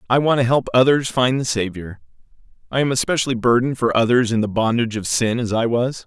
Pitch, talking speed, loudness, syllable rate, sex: 120 Hz, 220 wpm, -18 LUFS, 6.2 syllables/s, male